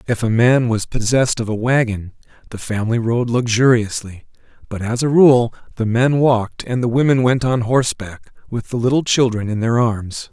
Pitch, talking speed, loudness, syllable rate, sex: 120 Hz, 185 wpm, -17 LUFS, 5.2 syllables/s, male